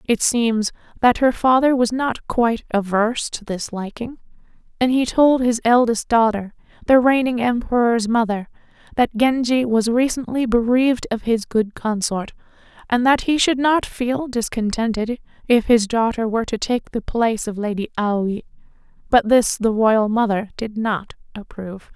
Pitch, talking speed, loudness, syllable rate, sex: 230 Hz, 155 wpm, -19 LUFS, 4.7 syllables/s, female